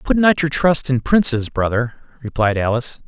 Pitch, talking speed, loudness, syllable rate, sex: 135 Hz, 175 wpm, -17 LUFS, 5.2 syllables/s, male